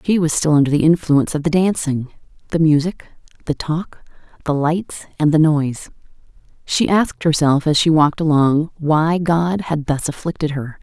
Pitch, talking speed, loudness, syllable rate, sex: 155 Hz, 170 wpm, -17 LUFS, 5.1 syllables/s, female